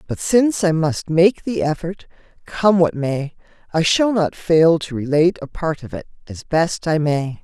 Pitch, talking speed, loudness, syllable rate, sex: 165 Hz, 195 wpm, -18 LUFS, 4.5 syllables/s, female